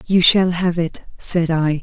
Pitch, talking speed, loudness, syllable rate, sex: 170 Hz, 195 wpm, -17 LUFS, 3.9 syllables/s, female